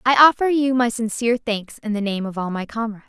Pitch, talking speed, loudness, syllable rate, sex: 230 Hz, 255 wpm, -20 LUFS, 6.1 syllables/s, female